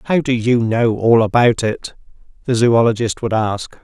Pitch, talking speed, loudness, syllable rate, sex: 115 Hz, 170 wpm, -16 LUFS, 4.5 syllables/s, male